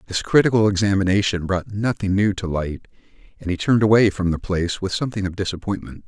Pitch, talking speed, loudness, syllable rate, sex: 95 Hz, 190 wpm, -20 LUFS, 6.3 syllables/s, male